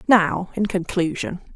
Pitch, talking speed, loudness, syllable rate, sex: 185 Hz, 115 wpm, -22 LUFS, 4.0 syllables/s, female